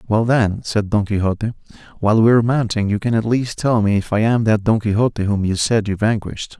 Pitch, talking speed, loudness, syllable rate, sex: 110 Hz, 235 wpm, -18 LUFS, 5.9 syllables/s, male